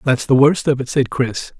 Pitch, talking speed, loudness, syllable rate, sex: 135 Hz, 265 wpm, -16 LUFS, 4.9 syllables/s, male